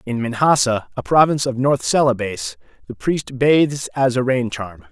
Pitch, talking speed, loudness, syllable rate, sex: 125 Hz, 170 wpm, -18 LUFS, 4.9 syllables/s, male